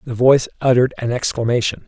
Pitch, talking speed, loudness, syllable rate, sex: 125 Hz, 160 wpm, -17 LUFS, 6.8 syllables/s, male